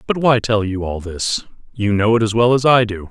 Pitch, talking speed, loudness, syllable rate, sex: 110 Hz, 250 wpm, -17 LUFS, 5.2 syllables/s, male